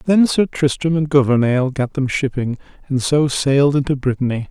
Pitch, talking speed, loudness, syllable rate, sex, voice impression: 140 Hz, 175 wpm, -17 LUFS, 5.2 syllables/s, male, masculine, adult-like, refreshing, friendly